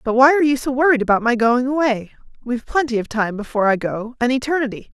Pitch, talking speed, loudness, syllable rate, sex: 245 Hz, 230 wpm, -18 LUFS, 6.7 syllables/s, female